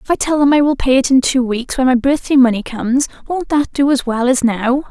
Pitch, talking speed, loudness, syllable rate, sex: 265 Hz, 280 wpm, -14 LUFS, 5.7 syllables/s, female